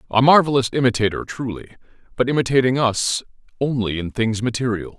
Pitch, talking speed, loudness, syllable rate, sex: 120 Hz, 130 wpm, -19 LUFS, 5.9 syllables/s, male